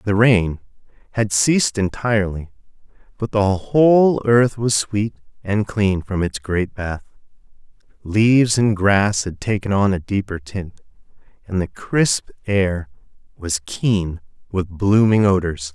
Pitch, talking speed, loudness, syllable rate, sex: 100 Hz, 135 wpm, -19 LUFS, 3.9 syllables/s, male